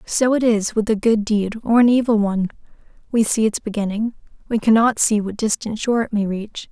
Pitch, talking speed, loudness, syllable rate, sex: 220 Hz, 215 wpm, -19 LUFS, 5.5 syllables/s, female